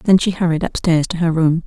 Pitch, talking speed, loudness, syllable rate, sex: 170 Hz, 250 wpm, -17 LUFS, 5.5 syllables/s, female